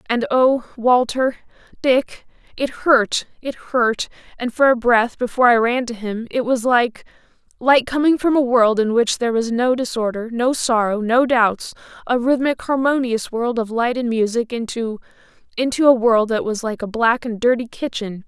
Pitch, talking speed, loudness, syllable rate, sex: 240 Hz, 160 wpm, -18 LUFS, 4.7 syllables/s, female